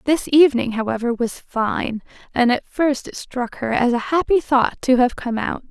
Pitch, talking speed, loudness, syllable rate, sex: 255 Hz, 200 wpm, -19 LUFS, 4.7 syllables/s, female